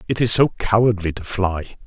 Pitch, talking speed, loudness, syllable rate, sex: 105 Hz, 195 wpm, -18 LUFS, 5.4 syllables/s, male